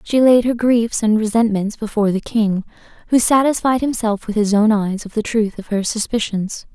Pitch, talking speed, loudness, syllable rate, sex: 220 Hz, 195 wpm, -17 LUFS, 5.1 syllables/s, female